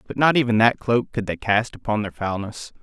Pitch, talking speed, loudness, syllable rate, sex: 115 Hz, 235 wpm, -21 LUFS, 5.4 syllables/s, male